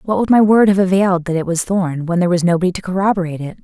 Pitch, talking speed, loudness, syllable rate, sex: 185 Hz, 280 wpm, -15 LUFS, 7.3 syllables/s, female